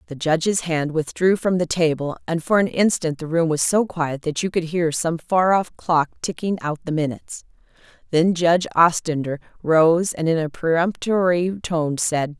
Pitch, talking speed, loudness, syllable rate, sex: 165 Hz, 185 wpm, -20 LUFS, 4.7 syllables/s, female